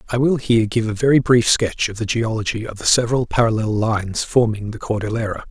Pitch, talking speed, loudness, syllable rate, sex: 115 Hz, 205 wpm, -18 LUFS, 6.1 syllables/s, male